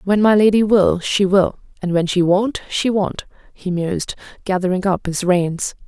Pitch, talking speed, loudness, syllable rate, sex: 190 Hz, 185 wpm, -17 LUFS, 4.6 syllables/s, female